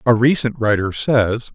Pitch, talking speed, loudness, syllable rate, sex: 115 Hz, 155 wpm, -17 LUFS, 4.2 syllables/s, male